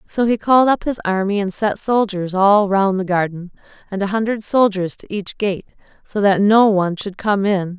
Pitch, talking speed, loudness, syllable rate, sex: 200 Hz, 210 wpm, -17 LUFS, 4.9 syllables/s, female